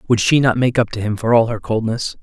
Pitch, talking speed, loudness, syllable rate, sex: 115 Hz, 295 wpm, -17 LUFS, 5.9 syllables/s, male